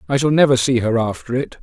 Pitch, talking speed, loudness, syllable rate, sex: 125 Hz, 260 wpm, -17 LUFS, 6.3 syllables/s, male